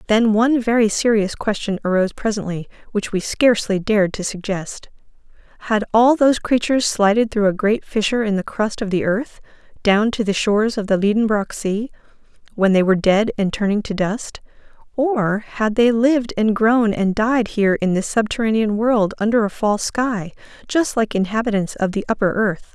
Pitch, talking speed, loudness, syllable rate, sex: 215 Hz, 180 wpm, -18 LUFS, 5.3 syllables/s, female